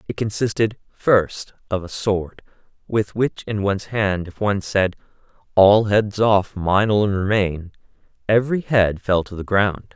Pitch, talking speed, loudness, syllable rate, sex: 100 Hz, 155 wpm, -20 LUFS, 4.5 syllables/s, male